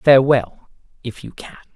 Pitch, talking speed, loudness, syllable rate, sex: 125 Hz, 135 wpm, -16 LUFS, 4.8 syllables/s, male